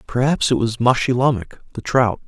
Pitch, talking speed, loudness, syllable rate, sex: 125 Hz, 160 wpm, -18 LUFS, 5.6 syllables/s, male